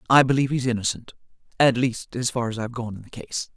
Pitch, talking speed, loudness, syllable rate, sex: 120 Hz, 220 wpm, -23 LUFS, 6.5 syllables/s, female